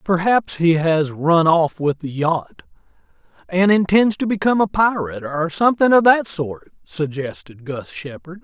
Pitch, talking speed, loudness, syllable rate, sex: 170 Hz, 155 wpm, -18 LUFS, 4.6 syllables/s, male